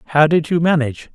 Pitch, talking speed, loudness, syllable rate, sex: 155 Hz, 210 wpm, -16 LUFS, 7.1 syllables/s, male